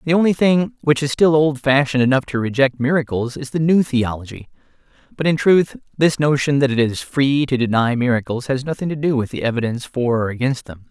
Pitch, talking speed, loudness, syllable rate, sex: 135 Hz, 210 wpm, -18 LUFS, 5.7 syllables/s, male